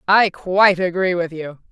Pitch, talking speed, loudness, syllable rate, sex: 180 Hz, 175 wpm, -17 LUFS, 4.7 syllables/s, female